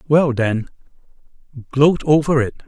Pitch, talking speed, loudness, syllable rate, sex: 140 Hz, 110 wpm, -17 LUFS, 4.5 syllables/s, male